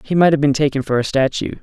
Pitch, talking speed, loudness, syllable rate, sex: 140 Hz, 295 wpm, -17 LUFS, 6.5 syllables/s, male